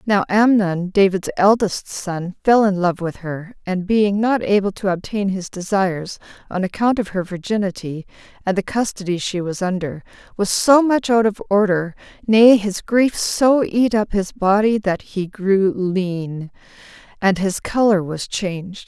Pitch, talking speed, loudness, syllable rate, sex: 195 Hz, 165 wpm, -18 LUFS, 4.2 syllables/s, female